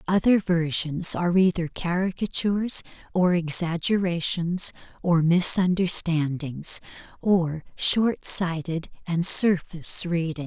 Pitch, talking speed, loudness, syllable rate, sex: 175 Hz, 80 wpm, -23 LUFS, 3.9 syllables/s, female